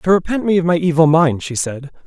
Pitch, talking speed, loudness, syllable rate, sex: 165 Hz, 260 wpm, -16 LUFS, 5.9 syllables/s, male